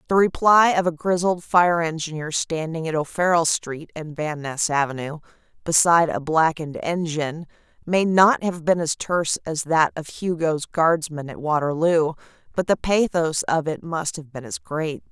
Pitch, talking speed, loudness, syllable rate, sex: 160 Hz, 165 wpm, -21 LUFS, 4.7 syllables/s, female